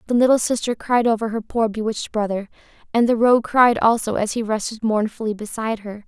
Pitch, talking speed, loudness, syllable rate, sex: 225 Hz, 195 wpm, -20 LUFS, 5.9 syllables/s, female